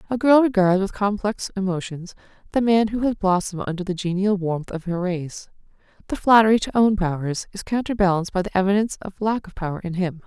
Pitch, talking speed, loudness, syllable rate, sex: 195 Hz, 200 wpm, -21 LUFS, 6.0 syllables/s, female